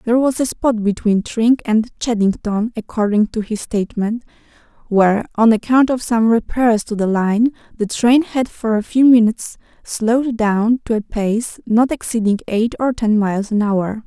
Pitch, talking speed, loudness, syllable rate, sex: 225 Hz, 175 wpm, -17 LUFS, 4.7 syllables/s, female